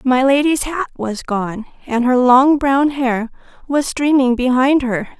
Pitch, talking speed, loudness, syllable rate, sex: 260 Hz, 160 wpm, -16 LUFS, 3.9 syllables/s, female